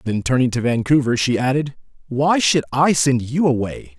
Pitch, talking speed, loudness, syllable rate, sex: 130 Hz, 180 wpm, -18 LUFS, 4.9 syllables/s, male